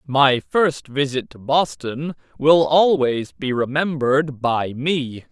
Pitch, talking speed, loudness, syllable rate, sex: 140 Hz, 125 wpm, -19 LUFS, 3.4 syllables/s, male